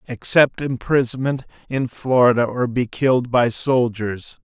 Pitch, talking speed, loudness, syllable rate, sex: 125 Hz, 120 wpm, -19 LUFS, 4.2 syllables/s, male